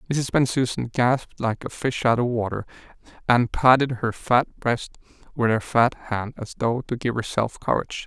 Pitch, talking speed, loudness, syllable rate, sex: 120 Hz, 180 wpm, -23 LUFS, 4.8 syllables/s, male